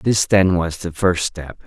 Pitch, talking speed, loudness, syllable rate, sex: 90 Hz, 215 wpm, -18 LUFS, 3.8 syllables/s, male